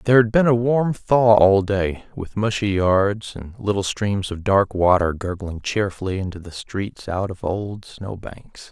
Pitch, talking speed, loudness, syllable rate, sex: 100 Hz, 185 wpm, -20 LUFS, 4.1 syllables/s, male